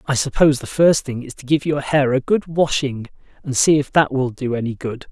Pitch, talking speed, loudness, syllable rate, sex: 140 Hz, 245 wpm, -18 LUFS, 5.4 syllables/s, male